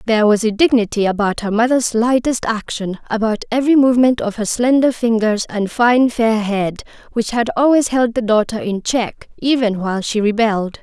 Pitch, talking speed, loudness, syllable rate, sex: 230 Hz, 175 wpm, -16 LUFS, 5.2 syllables/s, female